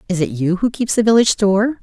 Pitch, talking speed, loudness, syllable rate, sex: 205 Hz, 265 wpm, -16 LUFS, 6.7 syllables/s, female